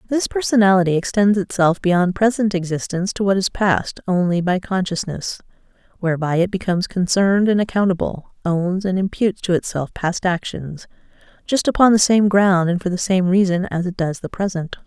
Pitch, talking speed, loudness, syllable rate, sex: 190 Hz, 165 wpm, -18 LUFS, 5.4 syllables/s, female